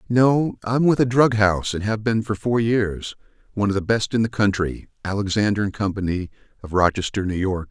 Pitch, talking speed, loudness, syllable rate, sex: 105 Hz, 200 wpm, -21 LUFS, 5.5 syllables/s, male